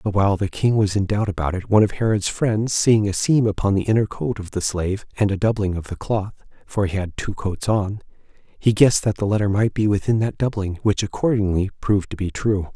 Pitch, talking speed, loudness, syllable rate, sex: 100 Hz, 240 wpm, -21 LUFS, 5.6 syllables/s, male